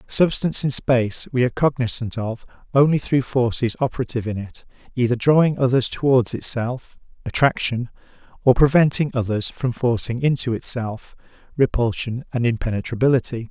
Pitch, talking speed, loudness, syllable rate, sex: 125 Hz, 130 wpm, -20 LUFS, 4.7 syllables/s, male